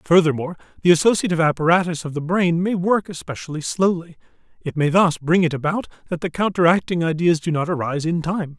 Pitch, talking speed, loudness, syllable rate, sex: 170 Hz, 180 wpm, -20 LUFS, 6.2 syllables/s, male